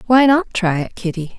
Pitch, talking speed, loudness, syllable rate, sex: 210 Hz, 215 wpm, -17 LUFS, 4.9 syllables/s, female